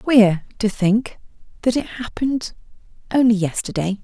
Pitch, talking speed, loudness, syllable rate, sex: 220 Hz, 120 wpm, -20 LUFS, 4.6 syllables/s, female